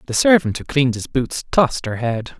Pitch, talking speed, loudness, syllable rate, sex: 135 Hz, 225 wpm, -18 LUFS, 5.5 syllables/s, male